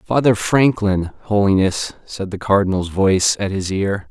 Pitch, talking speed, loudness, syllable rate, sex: 100 Hz, 145 wpm, -18 LUFS, 4.4 syllables/s, male